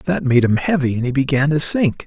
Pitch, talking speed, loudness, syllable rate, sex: 140 Hz, 260 wpm, -17 LUFS, 5.4 syllables/s, male